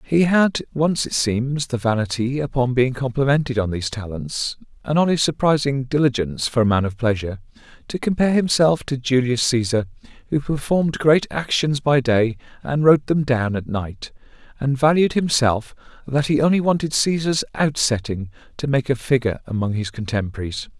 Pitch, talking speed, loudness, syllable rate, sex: 130 Hz, 165 wpm, -20 LUFS, 4.5 syllables/s, male